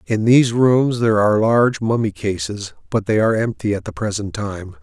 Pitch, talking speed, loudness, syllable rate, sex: 110 Hz, 200 wpm, -18 LUFS, 5.5 syllables/s, male